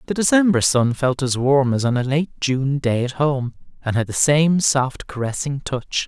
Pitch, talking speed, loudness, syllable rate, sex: 135 Hz, 210 wpm, -19 LUFS, 4.7 syllables/s, male